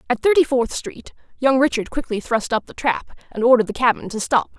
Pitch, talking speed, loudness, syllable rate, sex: 245 Hz, 225 wpm, -19 LUFS, 5.9 syllables/s, female